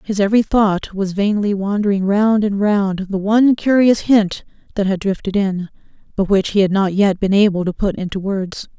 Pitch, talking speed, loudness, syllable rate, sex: 200 Hz, 200 wpm, -16 LUFS, 5.0 syllables/s, female